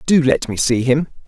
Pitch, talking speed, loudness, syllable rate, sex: 135 Hz, 235 wpm, -17 LUFS, 5.1 syllables/s, male